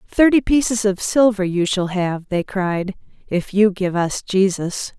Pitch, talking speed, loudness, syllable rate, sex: 200 Hz, 170 wpm, -19 LUFS, 4.0 syllables/s, female